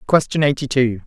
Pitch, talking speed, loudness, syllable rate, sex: 130 Hz, 170 wpm, -18 LUFS, 5.6 syllables/s, male